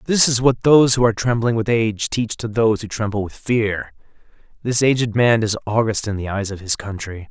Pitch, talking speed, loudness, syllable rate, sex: 110 Hz, 220 wpm, -18 LUFS, 5.7 syllables/s, male